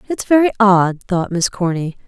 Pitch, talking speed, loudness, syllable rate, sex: 195 Hz, 175 wpm, -16 LUFS, 4.6 syllables/s, female